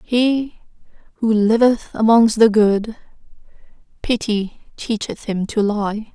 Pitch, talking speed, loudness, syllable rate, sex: 220 Hz, 100 wpm, -17 LUFS, 3.5 syllables/s, female